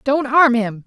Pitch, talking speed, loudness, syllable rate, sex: 255 Hz, 205 wpm, -15 LUFS, 3.9 syllables/s, female